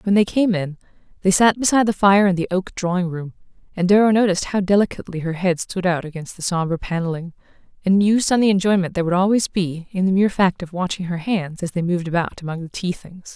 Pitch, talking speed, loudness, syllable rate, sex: 185 Hz, 235 wpm, -19 LUFS, 6.4 syllables/s, female